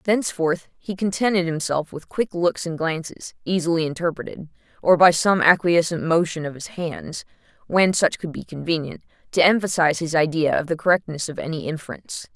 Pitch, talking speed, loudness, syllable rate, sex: 170 Hz, 165 wpm, -21 LUFS, 5.5 syllables/s, female